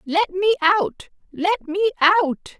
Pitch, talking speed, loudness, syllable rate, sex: 365 Hz, 140 wpm, -19 LUFS, 4.9 syllables/s, female